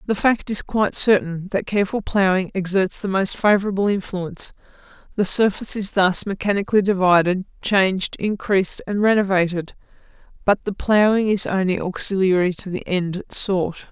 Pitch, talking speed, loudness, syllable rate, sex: 195 Hz, 140 wpm, -20 LUFS, 5.3 syllables/s, female